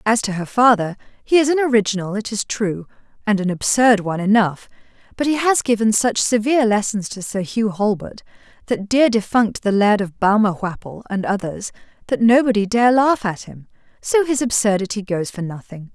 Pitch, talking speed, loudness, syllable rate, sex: 215 Hz, 180 wpm, -18 LUFS, 5.3 syllables/s, female